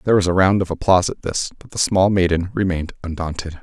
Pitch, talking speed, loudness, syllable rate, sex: 90 Hz, 230 wpm, -19 LUFS, 6.6 syllables/s, male